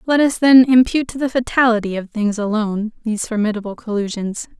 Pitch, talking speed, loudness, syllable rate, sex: 225 Hz, 170 wpm, -17 LUFS, 6.1 syllables/s, female